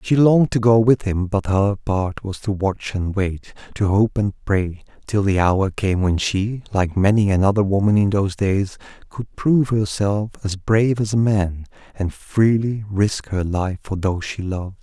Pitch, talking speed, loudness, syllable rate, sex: 100 Hz, 195 wpm, -20 LUFS, 4.5 syllables/s, male